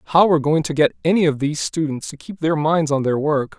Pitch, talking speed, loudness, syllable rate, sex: 155 Hz, 270 wpm, -19 LUFS, 5.8 syllables/s, male